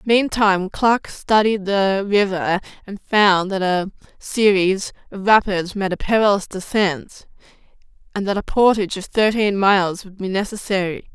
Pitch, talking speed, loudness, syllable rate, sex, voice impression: 200 Hz, 140 wpm, -18 LUFS, 4.5 syllables/s, female, feminine, adult-like, tensed, powerful, bright, slightly muffled, slightly halting, slightly intellectual, friendly, lively, sharp